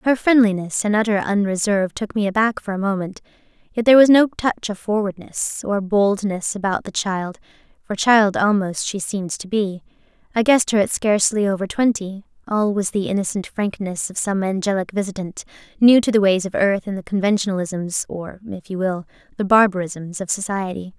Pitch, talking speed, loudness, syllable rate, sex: 200 Hz, 175 wpm, -19 LUFS, 5.4 syllables/s, female